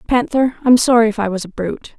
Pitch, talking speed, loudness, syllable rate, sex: 225 Hz, 240 wpm, -16 LUFS, 6.6 syllables/s, female